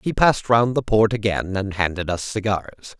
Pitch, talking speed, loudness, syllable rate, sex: 105 Hz, 200 wpm, -20 LUFS, 4.8 syllables/s, male